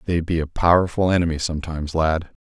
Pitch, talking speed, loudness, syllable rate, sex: 85 Hz, 175 wpm, -21 LUFS, 6.4 syllables/s, male